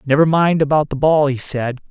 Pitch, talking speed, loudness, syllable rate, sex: 145 Hz, 220 wpm, -16 LUFS, 5.2 syllables/s, male